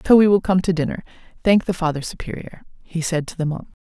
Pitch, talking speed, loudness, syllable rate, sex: 175 Hz, 235 wpm, -20 LUFS, 6.5 syllables/s, female